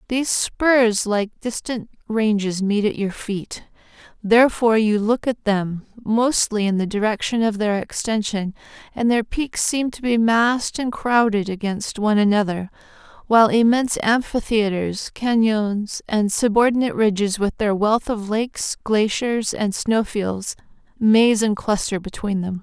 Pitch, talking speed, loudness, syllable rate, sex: 215 Hz, 145 wpm, -20 LUFS, 4.3 syllables/s, female